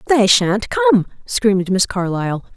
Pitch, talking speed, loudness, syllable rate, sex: 220 Hz, 140 wpm, -16 LUFS, 4.9 syllables/s, female